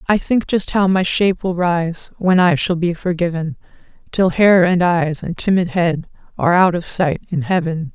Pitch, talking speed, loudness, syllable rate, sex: 180 Hz, 195 wpm, -17 LUFS, 4.7 syllables/s, female